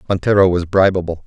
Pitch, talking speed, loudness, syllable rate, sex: 95 Hz, 145 wpm, -15 LUFS, 6.4 syllables/s, male